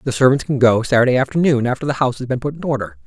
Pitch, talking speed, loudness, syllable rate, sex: 130 Hz, 275 wpm, -17 LUFS, 7.6 syllables/s, male